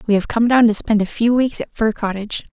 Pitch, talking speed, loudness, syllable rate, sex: 220 Hz, 280 wpm, -17 LUFS, 6.0 syllables/s, female